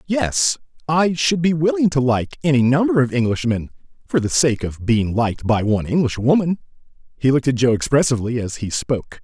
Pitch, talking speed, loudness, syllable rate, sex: 135 Hz, 175 wpm, -19 LUFS, 5.7 syllables/s, male